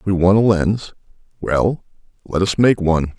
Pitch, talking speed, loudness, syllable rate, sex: 95 Hz, 170 wpm, -17 LUFS, 4.7 syllables/s, male